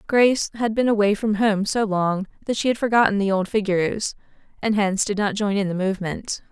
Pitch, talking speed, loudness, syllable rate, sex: 205 Hz, 210 wpm, -21 LUFS, 5.8 syllables/s, female